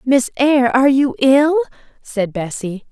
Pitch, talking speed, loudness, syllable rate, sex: 260 Hz, 145 wpm, -15 LUFS, 4.4 syllables/s, female